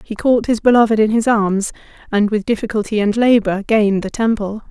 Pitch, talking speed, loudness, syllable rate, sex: 215 Hz, 190 wpm, -16 LUFS, 5.6 syllables/s, female